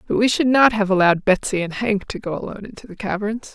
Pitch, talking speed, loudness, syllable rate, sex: 205 Hz, 255 wpm, -19 LUFS, 6.5 syllables/s, female